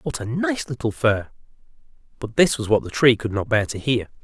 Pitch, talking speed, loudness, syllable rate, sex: 115 Hz, 225 wpm, -21 LUFS, 5.3 syllables/s, male